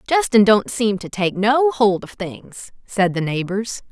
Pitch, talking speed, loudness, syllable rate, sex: 210 Hz, 185 wpm, -18 LUFS, 3.9 syllables/s, female